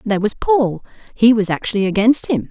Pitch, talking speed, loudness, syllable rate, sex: 220 Hz, 190 wpm, -16 LUFS, 5.7 syllables/s, female